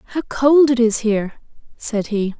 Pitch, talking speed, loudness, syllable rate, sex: 235 Hz, 175 wpm, -17 LUFS, 4.7 syllables/s, female